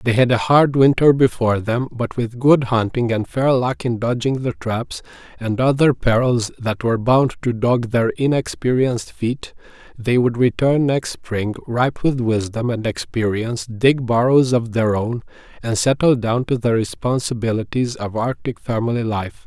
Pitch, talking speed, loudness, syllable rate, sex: 120 Hz, 165 wpm, -19 LUFS, 4.6 syllables/s, male